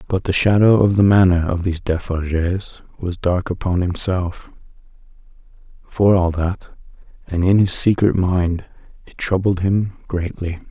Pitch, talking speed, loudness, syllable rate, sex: 90 Hz, 140 wpm, -18 LUFS, 4.5 syllables/s, male